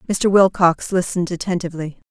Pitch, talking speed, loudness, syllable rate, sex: 180 Hz, 115 wpm, -18 LUFS, 5.9 syllables/s, female